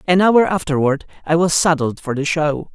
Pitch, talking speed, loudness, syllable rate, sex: 160 Hz, 195 wpm, -17 LUFS, 5.0 syllables/s, male